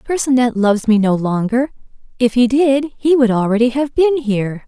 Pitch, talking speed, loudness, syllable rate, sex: 245 Hz, 180 wpm, -15 LUFS, 5.2 syllables/s, female